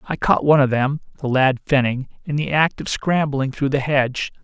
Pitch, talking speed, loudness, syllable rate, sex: 140 Hz, 190 wpm, -19 LUFS, 5.3 syllables/s, male